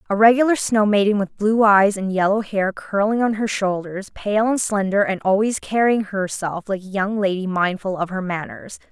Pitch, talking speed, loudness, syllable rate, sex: 200 Hz, 195 wpm, -19 LUFS, 4.9 syllables/s, female